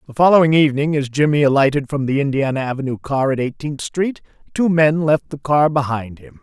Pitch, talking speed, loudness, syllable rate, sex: 145 Hz, 195 wpm, -17 LUFS, 5.7 syllables/s, male